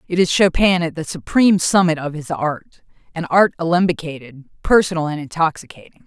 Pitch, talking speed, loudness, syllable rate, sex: 165 Hz, 160 wpm, -17 LUFS, 5.6 syllables/s, female